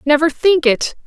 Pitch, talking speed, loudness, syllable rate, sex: 305 Hz, 170 wpm, -14 LUFS, 4.6 syllables/s, female